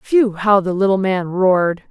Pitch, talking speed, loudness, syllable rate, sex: 195 Hz, 190 wpm, -16 LUFS, 4.4 syllables/s, female